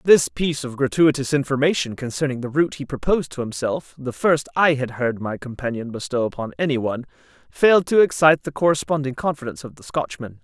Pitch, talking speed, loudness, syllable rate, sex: 140 Hz, 185 wpm, -21 LUFS, 6.2 syllables/s, male